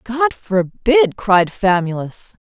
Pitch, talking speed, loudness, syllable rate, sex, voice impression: 215 Hz, 95 wpm, -16 LUFS, 3.1 syllables/s, female, feminine, adult-like, tensed, powerful, hard, clear, fluent, intellectual, elegant, lively, slightly strict, sharp